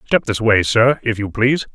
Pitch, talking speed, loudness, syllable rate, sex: 115 Hz, 240 wpm, -16 LUFS, 5.3 syllables/s, male